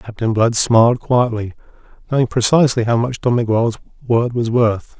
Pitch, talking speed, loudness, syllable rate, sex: 115 Hz, 155 wpm, -16 LUFS, 5.2 syllables/s, male